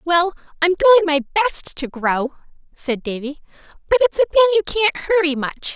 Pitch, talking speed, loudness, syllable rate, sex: 345 Hz, 175 wpm, -18 LUFS, 5.8 syllables/s, female